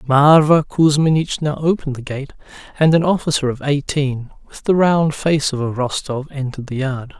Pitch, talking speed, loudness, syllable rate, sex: 145 Hz, 165 wpm, -17 LUFS, 5.1 syllables/s, male